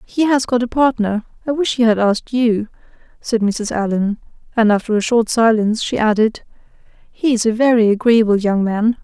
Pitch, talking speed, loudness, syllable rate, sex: 225 Hz, 185 wpm, -16 LUFS, 5.3 syllables/s, female